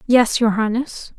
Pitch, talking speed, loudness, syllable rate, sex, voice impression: 230 Hz, 150 wpm, -18 LUFS, 4.0 syllables/s, female, very feminine, young, very thin, tensed, powerful, bright, soft, slightly clear, fluent, slightly raspy, very cute, intellectual, very refreshing, sincere, calm, very friendly, reassuring, very unique, elegant, slightly wild, sweet, lively, kind, slightly intense, slightly modest, light